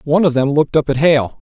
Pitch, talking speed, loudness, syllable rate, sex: 145 Hz, 270 wpm, -15 LUFS, 6.8 syllables/s, male